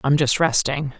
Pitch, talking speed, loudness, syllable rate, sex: 145 Hz, 180 wpm, -19 LUFS, 4.7 syllables/s, female